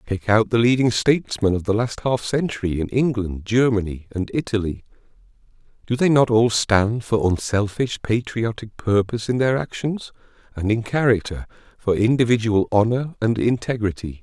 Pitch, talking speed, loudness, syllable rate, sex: 110 Hz, 150 wpm, -21 LUFS, 5.0 syllables/s, male